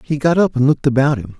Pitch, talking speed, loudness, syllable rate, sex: 140 Hz, 300 wpm, -15 LUFS, 7.0 syllables/s, male